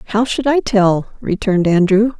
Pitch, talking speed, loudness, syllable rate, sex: 210 Hz, 165 wpm, -15 LUFS, 4.4 syllables/s, female